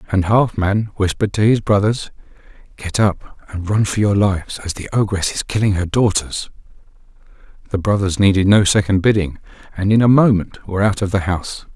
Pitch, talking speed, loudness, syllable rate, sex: 100 Hz, 180 wpm, -17 LUFS, 5.5 syllables/s, male